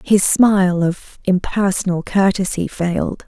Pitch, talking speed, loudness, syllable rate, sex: 190 Hz, 110 wpm, -17 LUFS, 4.4 syllables/s, female